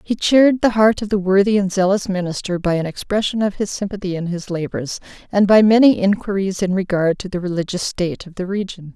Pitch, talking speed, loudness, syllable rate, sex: 190 Hz, 215 wpm, -18 LUFS, 5.9 syllables/s, female